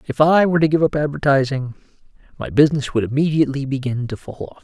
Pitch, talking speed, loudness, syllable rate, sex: 140 Hz, 195 wpm, -18 LUFS, 6.7 syllables/s, male